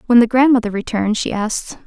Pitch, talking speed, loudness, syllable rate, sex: 230 Hz, 195 wpm, -16 LUFS, 6.6 syllables/s, female